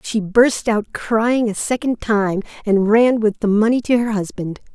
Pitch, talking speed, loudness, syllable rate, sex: 220 Hz, 190 wpm, -17 LUFS, 4.2 syllables/s, female